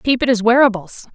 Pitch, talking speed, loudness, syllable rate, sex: 230 Hz, 210 wpm, -14 LUFS, 5.7 syllables/s, female